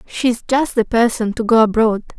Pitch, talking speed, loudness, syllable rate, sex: 230 Hz, 190 wpm, -16 LUFS, 4.7 syllables/s, female